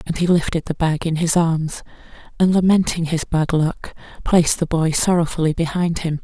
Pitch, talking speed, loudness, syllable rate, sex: 165 Hz, 185 wpm, -19 LUFS, 5.1 syllables/s, female